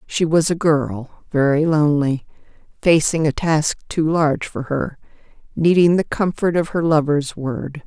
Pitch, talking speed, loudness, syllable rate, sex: 155 Hz, 155 wpm, -18 LUFS, 4.3 syllables/s, female